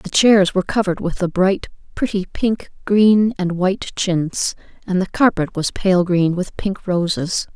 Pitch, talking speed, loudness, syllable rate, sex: 190 Hz, 175 wpm, -18 LUFS, 4.3 syllables/s, female